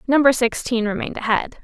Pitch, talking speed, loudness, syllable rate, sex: 240 Hz, 145 wpm, -20 LUFS, 6.0 syllables/s, female